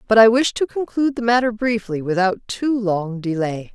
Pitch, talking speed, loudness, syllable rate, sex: 220 Hz, 190 wpm, -19 LUFS, 5.2 syllables/s, female